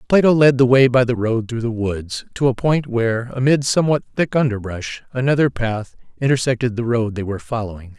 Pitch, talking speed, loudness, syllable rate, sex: 120 Hz, 195 wpm, -18 LUFS, 5.7 syllables/s, male